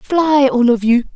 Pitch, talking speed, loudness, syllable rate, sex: 265 Hz, 210 wpm, -13 LUFS, 3.9 syllables/s, female